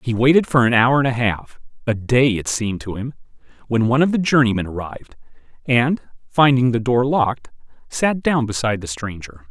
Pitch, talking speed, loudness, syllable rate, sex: 120 Hz, 185 wpm, -18 LUFS, 5.6 syllables/s, male